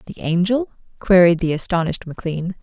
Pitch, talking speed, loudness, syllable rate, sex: 180 Hz, 135 wpm, -18 LUFS, 6.3 syllables/s, female